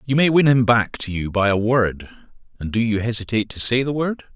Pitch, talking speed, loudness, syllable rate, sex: 115 Hz, 235 wpm, -19 LUFS, 5.8 syllables/s, male